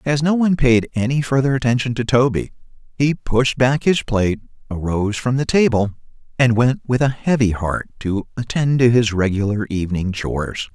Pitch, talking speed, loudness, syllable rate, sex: 120 Hz, 175 wpm, -18 LUFS, 5.2 syllables/s, male